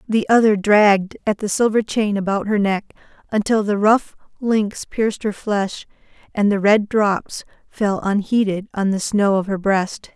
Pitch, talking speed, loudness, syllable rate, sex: 205 Hz, 170 wpm, -18 LUFS, 4.4 syllables/s, female